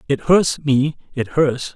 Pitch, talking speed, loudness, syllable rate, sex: 140 Hz, 170 wpm, -18 LUFS, 3.7 syllables/s, male